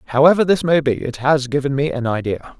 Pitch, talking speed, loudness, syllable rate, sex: 140 Hz, 230 wpm, -17 LUFS, 6.0 syllables/s, male